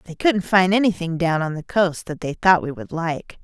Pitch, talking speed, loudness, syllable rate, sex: 175 Hz, 245 wpm, -20 LUFS, 5.1 syllables/s, female